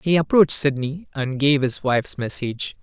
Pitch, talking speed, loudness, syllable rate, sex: 140 Hz, 170 wpm, -20 LUFS, 5.2 syllables/s, male